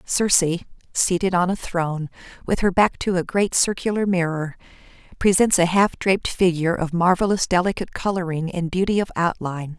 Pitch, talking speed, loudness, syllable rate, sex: 180 Hz, 160 wpm, -21 LUFS, 5.7 syllables/s, female